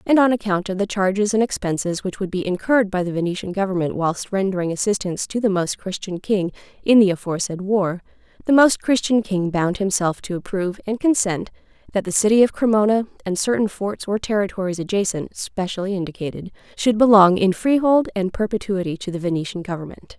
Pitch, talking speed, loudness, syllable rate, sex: 195 Hz, 180 wpm, -20 LUFS, 5.9 syllables/s, female